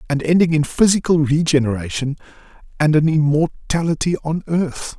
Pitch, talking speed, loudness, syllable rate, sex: 155 Hz, 120 wpm, -18 LUFS, 5.1 syllables/s, male